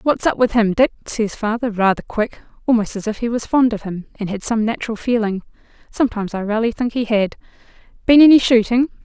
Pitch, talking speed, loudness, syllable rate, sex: 225 Hz, 190 wpm, -18 LUFS, 6.0 syllables/s, female